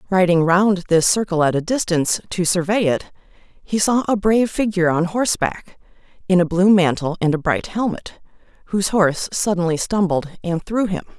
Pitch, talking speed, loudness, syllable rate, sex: 185 Hz, 170 wpm, -18 LUFS, 5.3 syllables/s, female